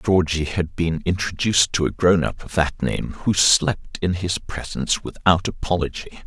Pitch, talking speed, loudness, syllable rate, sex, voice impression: 85 Hz, 170 wpm, -21 LUFS, 4.7 syllables/s, male, very masculine, very adult-like, slightly old, very thick, slightly relaxed, very powerful, very bright, very soft, muffled, fluent, very cool, very intellectual, refreshing, very sincere, very calm, very mature, very friendly, very reassuring, very unique, very elegant, very wild, very sweet, lively, kind